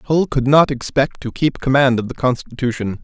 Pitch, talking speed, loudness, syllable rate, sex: 130 Hz, 195 wpm, -17 LUFS, 5.0 syllables/s, male